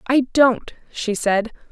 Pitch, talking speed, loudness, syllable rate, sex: 235 Hz, 140 wpm, -19 LUFS, 3.3 syllables/s, female